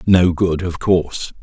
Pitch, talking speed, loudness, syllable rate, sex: 85 Hz, 170 wpm, -17 LUFS, 4.0 syllables/s, male